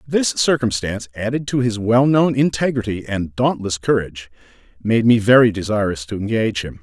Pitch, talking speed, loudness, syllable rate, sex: 110 Hz, 150 wpm, -18 LUFS, 5.4 syllables/s, male